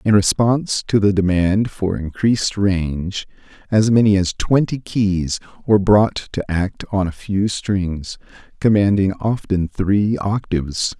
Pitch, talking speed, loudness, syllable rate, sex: 100 Hz, 135 wpm, -18 LUFS, 4.0 syllables/s, male